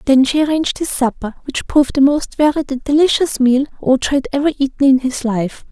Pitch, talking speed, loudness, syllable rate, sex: 275 Hz, 210 wpm, -15 LUFS, 5.9 syllables/s, female